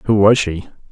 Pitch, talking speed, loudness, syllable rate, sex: 100 Hz, 195 wpm, -15 LUFS, 5.5 syllables/s, male